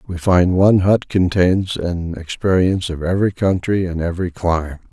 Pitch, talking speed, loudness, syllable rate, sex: 90 Hz, 160 wpm, -17 LUFS, 5.2 syllables/s, male